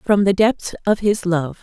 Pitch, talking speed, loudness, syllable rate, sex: 195 Hz, 220 wpm, -18 LUFS, 4.4 syllables/s, female